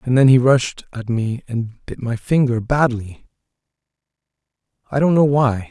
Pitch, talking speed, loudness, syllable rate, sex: 120 Hz, 160 wpm, -18 LUFS, 4.4 syllables/s, male